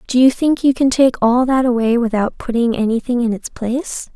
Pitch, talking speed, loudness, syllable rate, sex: 245 Hz, 215 wpm, -16 LUFS, 5.3 syllables/s, female